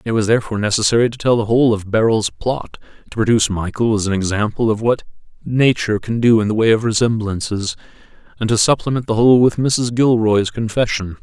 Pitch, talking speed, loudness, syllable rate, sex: 110 Hz, 190 wpm, -16 LUFS, 6.2 syllables/s, male